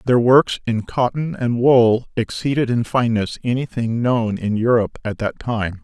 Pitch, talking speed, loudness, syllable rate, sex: 120 Hz, 165 wpm, -19 LUFS, 4.7 syllables/s, male